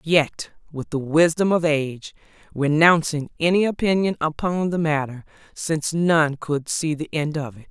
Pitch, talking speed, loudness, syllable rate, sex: 155 Hz, 155 wpm, -21 LUFS, 4.6 syllables/s, female